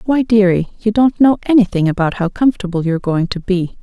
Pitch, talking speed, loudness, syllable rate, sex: 200 Hz, 205 wpm, -15 LUFS, 5.9 syllables/s, female